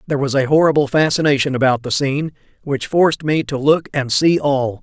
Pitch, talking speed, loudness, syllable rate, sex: 140 Hz, 200 wpm, -16 LUFS, 5.7 syllables/s, male